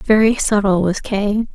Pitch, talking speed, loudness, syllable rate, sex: 205 Hz, 155 wpm, -16 LUFS, 4.1 syllables/s, female